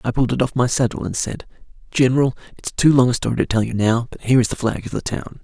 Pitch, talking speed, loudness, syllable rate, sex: 120 Hz, 285 wpm, -19 LUFS, 6.9 syllables/s, male